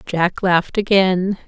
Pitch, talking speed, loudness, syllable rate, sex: 185 Hz, 120 wpm, -17 LUFS, 3.9 syllables/s, female